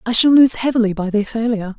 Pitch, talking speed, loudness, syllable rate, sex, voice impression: 225 Hz, 235 wpm, -15 LUFS, 6.6 syllables/s, female, feminine, adult-like, slightly thin, slightly relaxed, slightly weak, intellectual, slightly calm, slightly kind, slightly modest